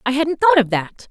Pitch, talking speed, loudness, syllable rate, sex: 275 Hz, 270 wpm, -17 LUFS, 5.0 syllables/s, female